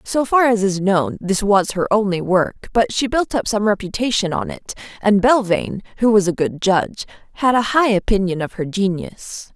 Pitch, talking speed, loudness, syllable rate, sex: 205 Hz, 200 wpm, -18 LUFS, 4.9 syllables/s, female